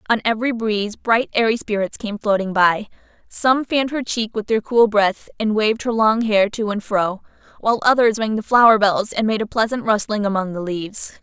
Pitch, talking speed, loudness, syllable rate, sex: 215 Hz, 210 wpm, -19 LUFS, 5.4 syllables/s, female